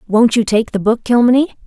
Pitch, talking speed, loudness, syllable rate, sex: 230 Hz, 215 wpm, -14 LUFS, 5.6 syllables/s, female